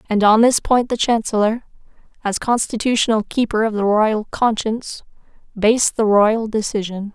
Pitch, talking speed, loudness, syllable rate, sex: 220 Hz, 145 wpm, -17 LUFS, 4.9 syllables/s, female